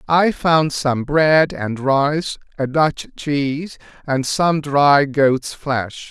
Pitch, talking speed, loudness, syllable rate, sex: 145 Hz, 140 wpm, -18 LUFS, 2.8 syllables/s, male